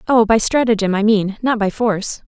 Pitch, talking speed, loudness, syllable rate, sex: 215 Hz, 210 wpm, -16 LUFS, 5.4 syllables/s, female